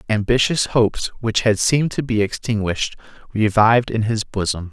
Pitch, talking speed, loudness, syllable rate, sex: 110 Hz, 155 wpm, -19 LUFS, 5.4 syllables/s, male